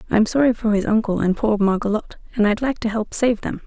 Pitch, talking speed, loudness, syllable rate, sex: 220 Hz, 245 wpm, -20 LUFS, 6.5 syllables/s, female